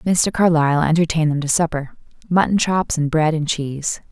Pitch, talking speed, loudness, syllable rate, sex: 160 Hz, 160 wpm, -18 LUFS, 5.4 syllables/s, female